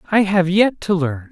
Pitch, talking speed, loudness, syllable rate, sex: 180 Hz, 230 wpm, -17 LUFS, 4.7 syllables/s, male